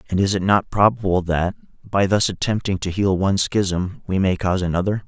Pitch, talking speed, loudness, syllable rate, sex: 95 Hz, 200 wpm, -20 LUFS, 5.5 syllables/s, male